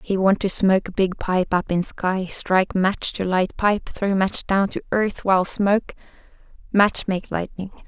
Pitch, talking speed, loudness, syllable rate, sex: 190 Hz, 175 wpm, -21 LUFS, 4.4 syllables/s, female